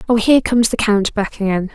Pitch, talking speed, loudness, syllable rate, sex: 220 Hz, 240 wpm, -16 LUFS, 6.5 syllables/s, female